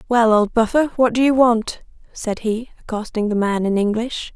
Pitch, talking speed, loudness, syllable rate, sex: 230 Hz, 195 wpm, -18 LUFS, 4.9 syllables/s, female